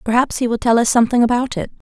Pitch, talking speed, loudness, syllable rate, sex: 235 Hz, 250 wpm, -16 LUFS, 7.4 syllables/s, female